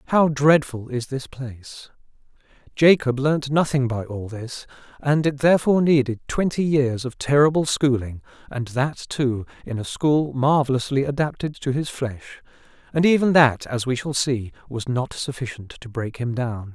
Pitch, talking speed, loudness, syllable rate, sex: 135 Hz, 160 wpm, -21 LUFS, 4.7 syllables/s, male